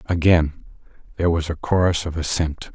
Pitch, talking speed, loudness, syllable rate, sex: 80 Hz, 155 wpm, -21 LUFS, 5.6 syllables/s, male